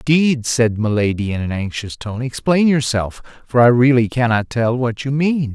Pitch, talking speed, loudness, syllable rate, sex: 125 Hz, 185 wpm, -17 LUFS, 4.9 syllables/s, male